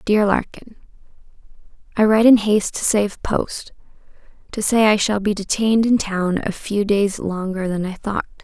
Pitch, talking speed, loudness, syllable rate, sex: 205 Hz, 165 wpm, -19 LUFS, 4.9 syllables/s, female